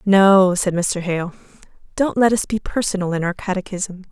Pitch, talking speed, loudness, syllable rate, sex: 190 Hz, 175 wpm, -18 LUFS, 4.8 syllables/s, female